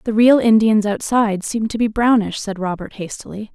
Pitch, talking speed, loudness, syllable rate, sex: 215 Hz, 185 wpm, -17 LUFS, 5.3 syllables/s, female